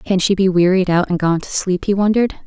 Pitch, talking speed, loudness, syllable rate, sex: 190 Hz, 270 wpm, -16 LUFS, 6.2 syllables/s, female